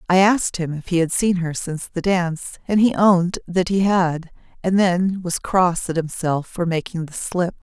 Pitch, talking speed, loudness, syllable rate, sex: 175 Hz, 200 wpm, -20 LUFS, 4.9 syllables/s, female